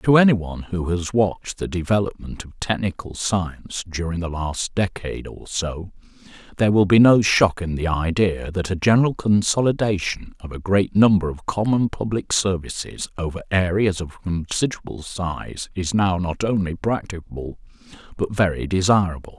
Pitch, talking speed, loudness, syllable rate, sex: 95 Hz, 150 wpm, -21 LUFS, 4.9 syllables/s, male